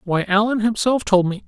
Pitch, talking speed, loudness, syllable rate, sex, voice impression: 210 Hz, 205 wpm, -18 LUFS, 5.2 syllables/s, male, masculine, middle-aged, slightly relaxed, powerful, bright, soft, slightly muffled, slightly raspy, slightly mature, friendly, reassuring, wild, lively, slightly kind